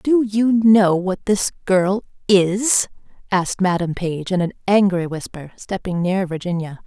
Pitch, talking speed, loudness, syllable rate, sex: 190 Hz, 150 wpm, -19 LUFS, 4.1 syllables/s, female